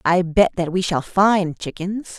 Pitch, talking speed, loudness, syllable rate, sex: 180 Hz, 190 wpm, -19 LUFS, 3.9 syllables/s, female